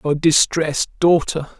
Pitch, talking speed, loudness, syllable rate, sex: 160 Hz, 115 wpm, -17 LUFS, 4.5 syllables/s, male